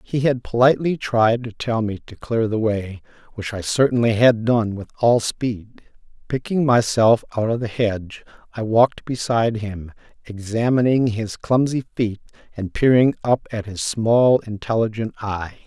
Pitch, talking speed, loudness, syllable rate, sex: 115 Hz, 155 wpm, -20 LUFS, 4.5 syllables/s, male